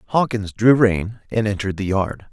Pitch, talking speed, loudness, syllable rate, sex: 105 Hz, 180 wpm, -19 LUFS, 5.2 syllables/s, male